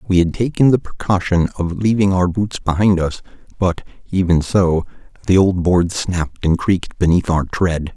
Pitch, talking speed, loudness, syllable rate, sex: 90 Hz, 175 wpm, -17 LUFS, 4.9 syllables/s, male